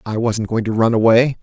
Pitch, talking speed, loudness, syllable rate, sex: 115 Hz, 255 wpm, -16 LUFS, 5.5 syllables/s, male